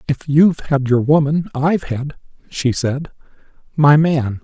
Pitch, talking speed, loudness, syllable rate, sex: 145 Hz, 150 wpm, -16 LUFS, 4.4 syllables/s, male